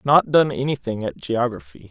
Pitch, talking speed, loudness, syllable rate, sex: 120 Hz, 160 wpm, -21 LUFS, 5.0 syllables/s, male